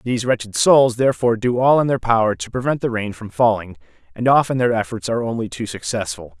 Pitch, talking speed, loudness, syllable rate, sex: 110 Hz, 215 wpm, -18 LUFS, 6.3 syllables/s, male